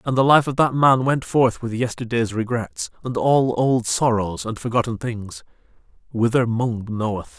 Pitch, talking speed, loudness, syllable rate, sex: 120 Hz, 165 wpm, -20 LUFS, 4.5 syllables/s, male